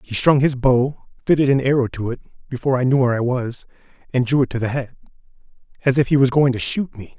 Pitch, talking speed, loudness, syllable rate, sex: 130 Hz, 240 wpm, -19 LUFS, 6.4 syllables/s, male